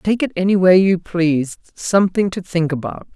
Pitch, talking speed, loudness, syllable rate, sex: 185 Hz, 190 wpm, -17 LUFS, 5.2 syllables/s, female